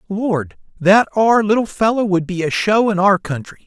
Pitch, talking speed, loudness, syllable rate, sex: 200 Hz, 195 wpm, -16 LUFS, 5.0 syllables/s, male